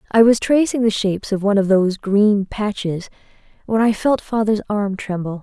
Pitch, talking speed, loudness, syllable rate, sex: 205 Hz, 190 wpm, -18 LUFS, 5.2 syllables/s, female